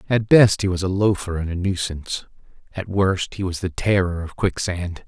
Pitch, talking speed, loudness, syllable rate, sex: 95 Hz, 200 wpm, -21 LUFS, 5.0 syllables/s, male